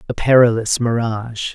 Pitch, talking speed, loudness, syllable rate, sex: 115 Hz, 115 wpm, -16 LUFS, 5.1 syllables/s, male